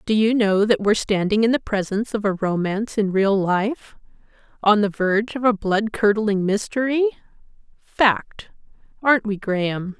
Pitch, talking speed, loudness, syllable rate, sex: 210 Hz, 150 wpm, -20 LUFS, 5.0 syllables/s, female